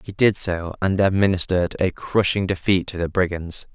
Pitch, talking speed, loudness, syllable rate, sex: 95 Hz, 175 wpm, -21 LUFS, 5.1 syllables/s, male